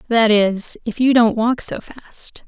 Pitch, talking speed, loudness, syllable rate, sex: 225 Hz, 195 wpm, -16 LUFS, 4.2 syllables/s, female